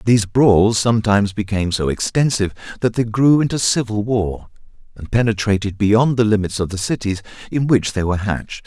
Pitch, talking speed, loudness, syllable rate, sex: 110 Hz, 175 wpm, -18 LUFS, 5.7 syllables/s, male